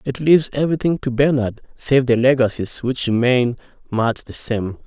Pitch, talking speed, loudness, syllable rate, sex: 130 Hz, 160 wpm, -18 LUFS, 5.0 syllables/s, male